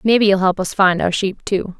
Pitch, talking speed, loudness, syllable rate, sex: 190 Hz, 270 wpm, -17 LUFS, 5.5 syllables/s, female